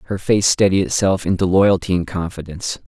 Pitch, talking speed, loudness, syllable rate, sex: 95 Hz, 165 wpm, -17 LUFS, 5.7 syllables/s, male